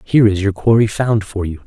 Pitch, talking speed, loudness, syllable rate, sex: 105 Hz, 250 wpm, -15 LUFS, 5.9 syllables/s, male